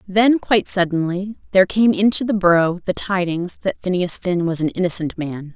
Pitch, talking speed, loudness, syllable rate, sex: 185 Hz, 185 wpm, -18 LUFS, 5.3 syllables/s, female